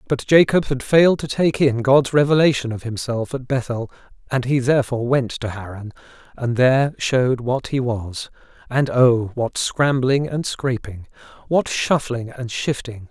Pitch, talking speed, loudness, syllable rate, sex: 125 Hz, 155 wpm, -19 LUFS, 4.7 syllables/s, male